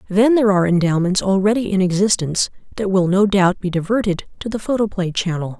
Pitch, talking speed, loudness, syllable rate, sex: 195 Hz, 180 wpm, -18 LUFS, 6.2 syllables/s, female